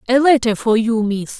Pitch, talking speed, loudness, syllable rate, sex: 235 Hz, 215 wpm, -16 LUFS, 5.0 syllables/s, female